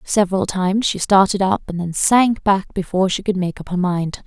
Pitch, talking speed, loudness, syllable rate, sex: 190 Hz, 225 wpm, -18 LUFS, 5.3 syllables/s, female